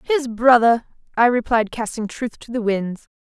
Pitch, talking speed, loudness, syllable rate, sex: 235 Hz, 165 wpm, -19 LUFS, 4.6 syllables/s, female